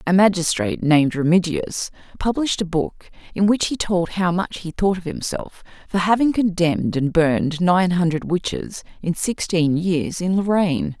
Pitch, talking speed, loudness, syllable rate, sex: 180 Hz, 165 wpm, -20 LUFS, 4.8 syllables/s, female